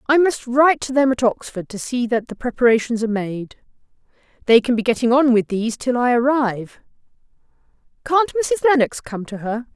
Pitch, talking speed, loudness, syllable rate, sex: 245 Hz, 185 wpm, -18 LUFS, 5.7 syllables/s, female